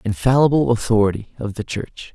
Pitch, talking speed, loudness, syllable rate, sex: 115 Hz, 140 wpm, -19 LUFS, 5.5 syllables/s, male